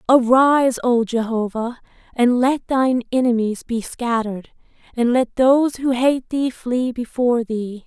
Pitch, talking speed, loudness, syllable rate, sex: 245 Hz, 135 wpm, -19 LUFS, 4.5 syllables/s, female